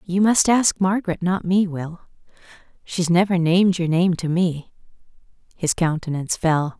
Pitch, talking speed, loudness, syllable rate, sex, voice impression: 175 Hz, 150 wpm, -20 LUFS, 4.8 syllables/s, female, feminine, soft, calm, sweet, kind